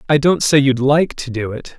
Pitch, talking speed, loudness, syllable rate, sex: 140 Hz, 270 wpm, -16 LUFS, 5.0 syllables/s, male